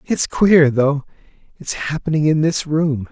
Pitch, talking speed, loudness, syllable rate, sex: 150 Hz, 155 wpm, -17 LUFS, 4.0 syllables/s, male